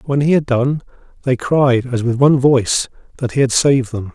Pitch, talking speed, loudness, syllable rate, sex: 130 Hz, 215 wpm, -16 LUFS, 5.5 syllables/s, male